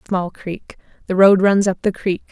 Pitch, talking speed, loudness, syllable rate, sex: 190 Hz, 180 wpm, -16 LUFS, 4.5 syllables/s, female